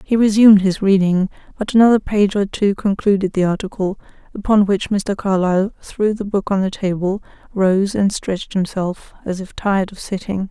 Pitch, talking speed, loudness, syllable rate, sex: 195 Hz, 175 wpm, -17 LUFS, 5.2 syllables/s, female